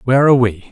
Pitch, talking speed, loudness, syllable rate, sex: 125 Hz, 250 wpm, -13 LUFS, 8.2 syllables/s, male